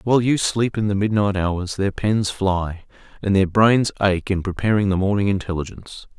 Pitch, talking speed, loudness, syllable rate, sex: 100 Hz, 185 wpm, -20 LUFS, 5.0 syllables/s, male